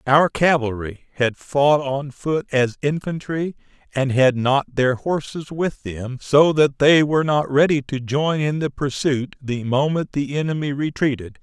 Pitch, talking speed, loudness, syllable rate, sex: 140 Hz, 165 wpm, -20 LUFS, 4.1 syllables/s, male